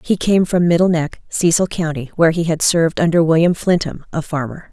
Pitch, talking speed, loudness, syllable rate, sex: 165 Hz, 205 wpm, -16 LUFS, 5.7 syllables/s, female